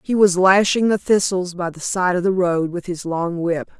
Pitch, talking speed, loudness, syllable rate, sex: 180 Hz, 235 wpm, -18 LUFS, 4.7 syllables/s, female